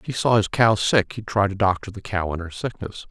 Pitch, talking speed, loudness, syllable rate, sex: 100 Hz, 290 wpm, -22 LUFS, 5.6 syllables/s, male